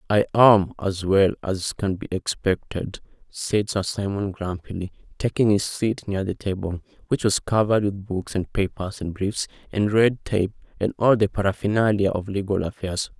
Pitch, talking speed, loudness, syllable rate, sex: 100 Hz, 170 wpm, -23 LUFS, 4.8 syllables/s, male